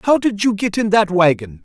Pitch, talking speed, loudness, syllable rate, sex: 190 Hz, 255 wpm, -16 LUFS, 5.0 syllables/s, male